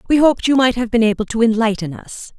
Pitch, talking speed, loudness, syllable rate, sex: 230 Hz, 250 wpm, -16 LUFS, 6.4 syllables/s, female